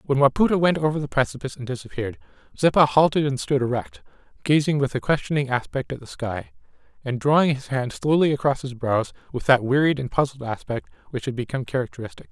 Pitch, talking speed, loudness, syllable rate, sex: 135 Hz, 190 wpm, -23 LUFS, 6.4 syllables/s, male